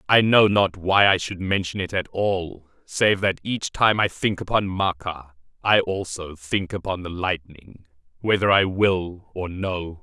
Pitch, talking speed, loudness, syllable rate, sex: 95 Hz, 175 wpm, -22 LUFS, 4.0 syllables/s, male